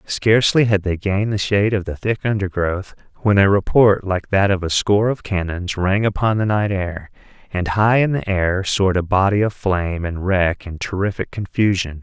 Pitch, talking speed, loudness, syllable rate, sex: 95 Hz, 200 wpm, -18 LUFS, 5.1 syllables/s, male